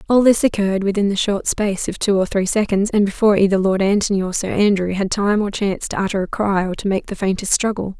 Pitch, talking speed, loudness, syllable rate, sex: 200 Hz, 255 wpm, -18 LUFS, 6.3 syllables/s, female